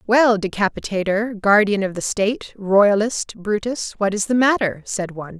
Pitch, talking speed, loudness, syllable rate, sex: 205 Hz, 155 wpm, -19 LUFS, 4.7 syllables/s, female